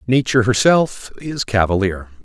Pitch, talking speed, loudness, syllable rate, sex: 115 Hz, 105 wpm, -17 LUFS, 4.8 syllables/s, male